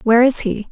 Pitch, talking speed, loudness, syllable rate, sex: 235 Hz, 255 wpm, -14 LUFS, 6.6 syllables/s, female